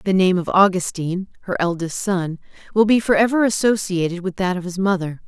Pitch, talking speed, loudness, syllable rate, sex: 185 Hz, 195 wpm, -19 LUFS, 5.7 syllables/s, female